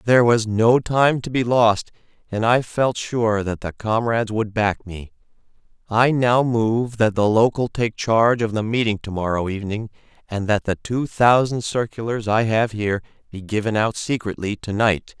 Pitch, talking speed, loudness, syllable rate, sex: 110 Hz, 180 wpm, -20 LUFS, 4.7 syllables/s, male